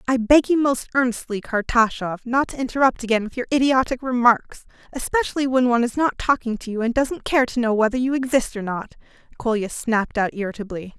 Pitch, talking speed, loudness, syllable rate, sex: 240 Hz, 195 wpm, -21 LUFS, 5.9 syllables/s, female